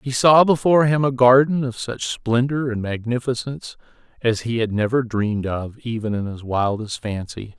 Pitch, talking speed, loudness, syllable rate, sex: 120 Hz, 175 wpm, -20 LUFS, 5.0 syllables/s, male